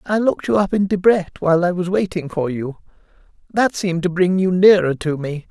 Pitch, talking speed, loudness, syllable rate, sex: 180 Hz, 220 wpm, -18 LUFS, 5.6 syllables/s, male